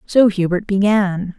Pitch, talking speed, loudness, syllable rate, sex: 195 Hz, 130 wpm, -16 LUFS, 3.9 syllables/s, female